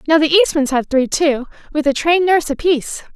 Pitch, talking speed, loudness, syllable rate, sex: 300 Hz, 210 wpm, -16 LUFS, 6.4 syllables/s, female